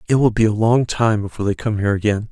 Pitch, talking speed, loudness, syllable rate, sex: 110 Hz, 285 wpm, -18 LUFS, 7.0 syllables/s, male